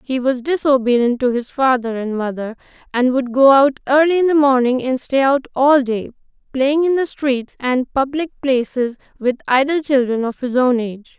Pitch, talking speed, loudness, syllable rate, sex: 260 Hz, 190 wpm, -17 LUFS, 4.9 syllables/s, female